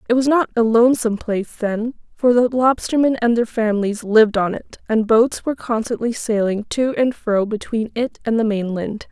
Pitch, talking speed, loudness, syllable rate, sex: 230 Hz, 190 wpm, -18 LUFS, 5.2 syllables/s, female